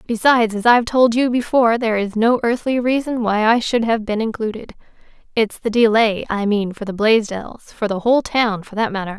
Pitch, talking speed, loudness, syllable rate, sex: 225 Hz, 200 wpm, -17 LUFS, 5.5 syllables/s, female